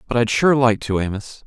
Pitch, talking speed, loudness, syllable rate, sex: 115 Hz, 245 wpm, -18 LUFS, 5.4 syllables/s, male